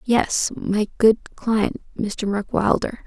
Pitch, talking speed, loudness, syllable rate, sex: 215 Hz, 135 wpm, -21 LUFS, 3.7 syllables/s, female